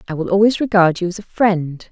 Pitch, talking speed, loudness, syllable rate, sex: 190 Hz, 250 wpm, -16 LUFS, 5.8 syllables/s, female